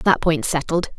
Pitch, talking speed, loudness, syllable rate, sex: 160 Hz, 185 wpm, -20 LUFS, 5.2 syllables/s, female